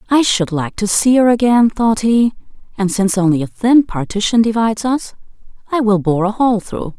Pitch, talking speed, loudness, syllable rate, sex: 215 Hz, 200 wpm, -15 LUFS, 5.2 syllables/s, female